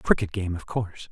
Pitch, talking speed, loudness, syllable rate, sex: 90 Hz, 270 wpm, -27 LUFS, 6.5 syllables/s, male